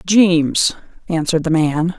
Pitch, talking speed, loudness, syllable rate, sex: 165 Hz, 120 wpm, -16 LUFS, 4.6 syllables/s, female